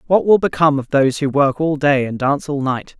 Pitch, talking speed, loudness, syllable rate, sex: 145 Hz, 260 wpm, -16 LUFS, 6.0 syllables/s, male